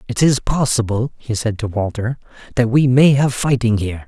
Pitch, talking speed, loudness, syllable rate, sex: 120 Hz, 190 wpm, -17 LUFS, 5.2 syllables/s, male